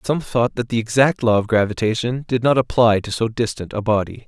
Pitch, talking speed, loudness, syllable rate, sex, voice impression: 115 Hz, 225 wpm, -19 LUFS, 5.6 syllables/s, male, masculine, adult-like, tensed, powerful, slightly hard, clear, fluent, intellectual, slightly calm, slightly wild, lively, slightly strict, slightly sharp